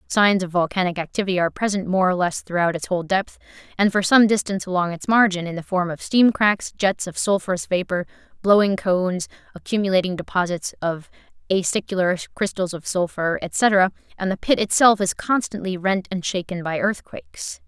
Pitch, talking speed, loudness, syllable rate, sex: 190 Hz, 175 wpm, -21 LUFS, 5.5 syllables/s, female